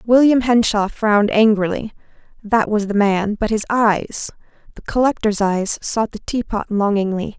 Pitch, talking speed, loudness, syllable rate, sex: 215 Hz, 120 wpm, -18 LUFS, 4.5 syllables/s, female